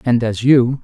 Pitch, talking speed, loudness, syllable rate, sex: 120 Hz, 215 wpm, -15 LUFS, 4.1 syllables/s, male